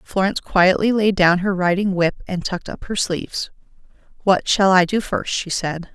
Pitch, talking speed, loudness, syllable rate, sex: 185 Hz, 190 wpm, -19 LUFS, 4.9 syllables/s, female